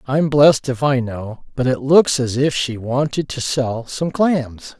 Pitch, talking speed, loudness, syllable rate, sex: 135 Hz, 200 wpm, -18 LUFS, 4.0 syllables/s, male